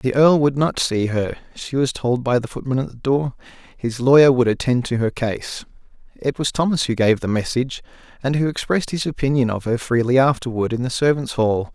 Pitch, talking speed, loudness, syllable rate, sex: 130 Hz, 215 wpm, -19 LUFS, 5.5 syllables/s, male